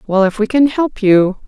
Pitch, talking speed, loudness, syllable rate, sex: 220 Hz, 245 wpm, -13 LUFS, 4.7 syllables/s, female